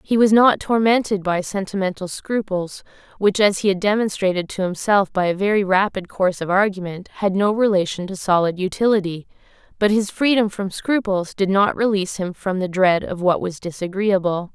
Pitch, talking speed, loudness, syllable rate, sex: 195 Hz, 175 wpm, -19 LUFS, 5.2 syllables/s, female